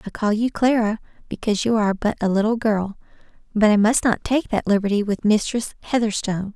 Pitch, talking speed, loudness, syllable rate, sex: 215 Hz, 190 wpm, -20 LUFS, 5.9 syllables/s, female